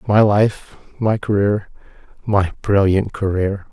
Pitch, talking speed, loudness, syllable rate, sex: 100 Hz, 80 wpm, -18 LUFS, 3.8 syllables/s, male